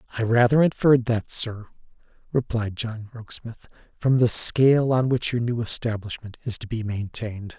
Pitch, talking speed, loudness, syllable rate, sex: 115 Hz, 160 wpm, -22 LUFS, 5.1 syllables/s, male